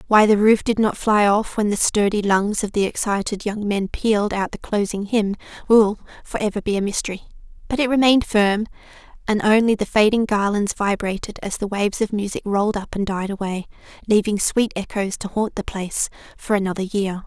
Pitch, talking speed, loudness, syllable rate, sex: 205 Hz, 200 wpm, -20 LUFS, 5.5 syllables/s, female